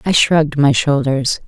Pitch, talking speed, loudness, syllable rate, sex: 145 Hz, 165 wpm, -14 LUFS, 4.6 syllables/s, female